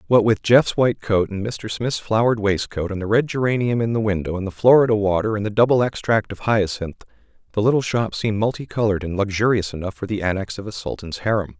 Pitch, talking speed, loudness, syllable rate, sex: 105 Hz, 220 wpm, -20 LUFS, 6.2 syllables/s, male